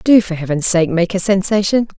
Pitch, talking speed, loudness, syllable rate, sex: 190 Hz, 210 wpm, -15 LUFS, 5.6 syllables/s, female